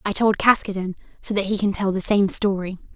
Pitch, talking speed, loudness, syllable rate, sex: 200 Hz, 225 wpm, -20 LUFS, 5.7 syllables/s, female